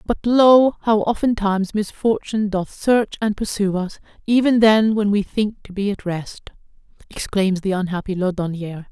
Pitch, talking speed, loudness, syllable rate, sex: 205 Hz, 155 wpm, -19 LUFS, 4.9 syllables/s, female